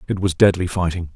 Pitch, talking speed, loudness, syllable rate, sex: 90 Hz, 205 wpm, -19 LUFS, 6.2 syllables/s, male